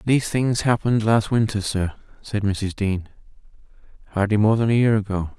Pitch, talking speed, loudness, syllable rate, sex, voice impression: 105 Hz, 165 wpm, -21 LUFS, 5.4 syllables/s, male, masculine, adult-like, relaxed, weak, dark, fluent, slightly sincere, calm, modest